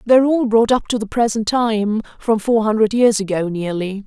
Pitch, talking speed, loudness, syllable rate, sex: 220 Hz, 190 wpm, -17 LUFS, 5.0 syllables/s, female